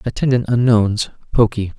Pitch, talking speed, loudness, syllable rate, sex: 115 Hz, 100 wpm, -17 LUFS, 4.8 syllables/s, male